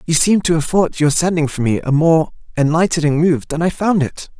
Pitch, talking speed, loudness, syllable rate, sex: 160 Hz, 230 wpm, -16 LUFS, 5.4 syllables/s, male